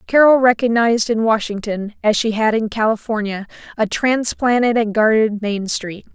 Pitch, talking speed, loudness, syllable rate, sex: 220 Hz, 145 wpm, -17 LUFS, 4.9 syllables/s, female